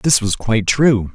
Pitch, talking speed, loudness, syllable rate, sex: 115 Hz, 210 wpm, -15 LUFS, 4.5 syllables/s, male